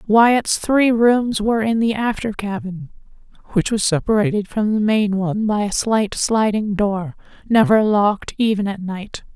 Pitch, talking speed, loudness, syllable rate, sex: 210 Hz, 160 wpm, -18 LUFS, 4.4 syllables/s, female